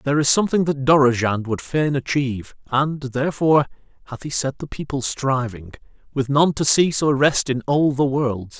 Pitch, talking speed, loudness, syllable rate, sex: 140 Hz, 180 wpm, -20 LUFS, 5.2 syllables/s, male